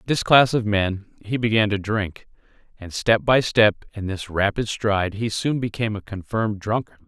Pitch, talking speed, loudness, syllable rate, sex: 105 Hz, 195 wpm, -21 LUFS, 5.2 syllables/s, male